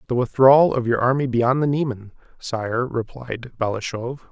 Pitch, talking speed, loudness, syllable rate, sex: 125 Hz, 155 wpm, -20 LUFS, 4.9 syllables/s, male